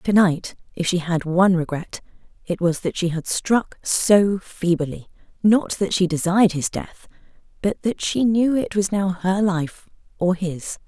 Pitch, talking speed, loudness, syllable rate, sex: 190 Hz, 170 wpm, -21 LUFS, 4.1 syllables/s, female